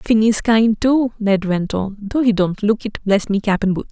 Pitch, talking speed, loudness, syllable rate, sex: 210 Hz, 245 wpm, -17 LUFS, 4.6 syllables/s, female